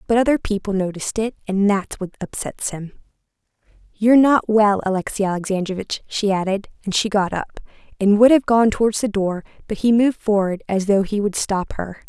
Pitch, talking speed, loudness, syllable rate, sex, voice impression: 205 Hz, 185 wpm, -19 LUFS, 5.5 syllables/s, female, feminine, adult-like, slightly relaxed, powerful, slightly dark, clear, intellectual, calm, reassuring, elegant, kind, modest